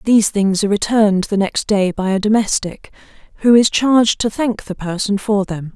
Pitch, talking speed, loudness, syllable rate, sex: 205 Hz, 200 wpm, -16 LUFS, 5.3 syllables/s, female